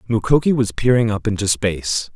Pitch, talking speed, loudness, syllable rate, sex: 115 Hz, 165 wpm, -18 LUFS, 5.6 syllables/s, male